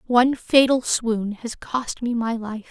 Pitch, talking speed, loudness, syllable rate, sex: 235 Hz, 175 wpm, -21 LUFS, 4.0 syllables/s, female